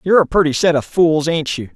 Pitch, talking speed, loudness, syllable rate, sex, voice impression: 160 Hz, 275 wpm, -15 LUFS, 6.1 syllables/s, male, masculine, very adult-like, thick, slightly relaxed, powerful, bright, soft, slightly clear, fluent, cool, intellectual, very refreshing, very sincere, calm, mature, friendly, reassuring, slightly unique, elegant, slightly wild, sweet, lively, kind, slightly modest